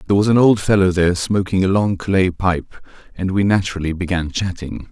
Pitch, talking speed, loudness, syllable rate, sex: 95 Hz, 195 wpm, -17 LUFS, 5.7 syllables/s, male